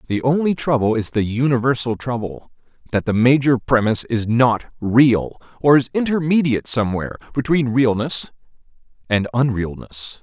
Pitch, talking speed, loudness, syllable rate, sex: 125 Hz, 130 wpm, -18 LUFS, 5.1 syllables/s, male